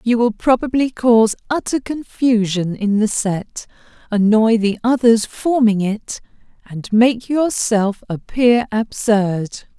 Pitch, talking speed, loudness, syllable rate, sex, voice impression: 225 Hz, 115 wpm, -17 LUFS, 3.7 syllables/s, female, very feminine, slightly adult-like, slightly middle-aged, very thin, tensed, slightly weak, bright, hard, very clear, slightly fluent, slightly cute, slightly cool, very intellectual, refreshing, very sincere, very calm, very friendly, reassuring, slightly unique, very elegant, sweet, lively, very kind